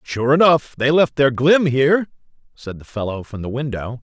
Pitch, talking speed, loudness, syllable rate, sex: 135 Hz, 195 wpm, -17 LUFS, 5.0 syllables/s, male